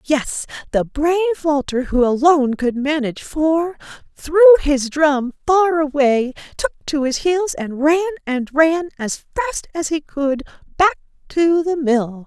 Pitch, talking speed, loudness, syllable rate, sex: 300 Hz, 150 wpm, -18 LUFS, 4.1 syllables/s, female